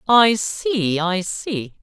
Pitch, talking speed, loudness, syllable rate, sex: 205 Hz, 130 wpm, -19 LUFS, 2.4 syllables/s, male